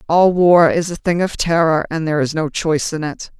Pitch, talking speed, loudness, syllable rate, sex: 160 Hz, 245 wpm, -16 LUFS, 5.5 syllables/s, female